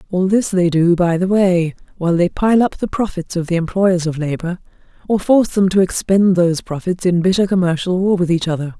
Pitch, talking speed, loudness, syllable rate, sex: 180 Hz, 220 wpm, -16 LUFS, 5.6 syllables/s, female